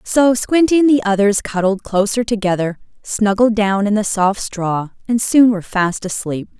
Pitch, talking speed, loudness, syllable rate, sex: 210 Hz, 175 wpm, -16 LUFS, 4.7 syllables/s, female